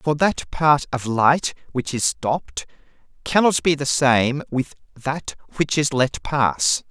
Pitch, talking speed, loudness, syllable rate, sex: 140 Hz, 155 wpm, -20 LUFS, 3.4 syllables/s, male